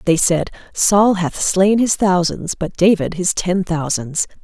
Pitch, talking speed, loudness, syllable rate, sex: 180 Hz, 160 wpm, -16 LUFS, 3.8 syllables/s, female